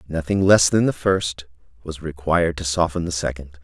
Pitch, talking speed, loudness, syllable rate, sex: 80 Hz, 180 wpm, -20 LUFS, 5.1 syllables/s, male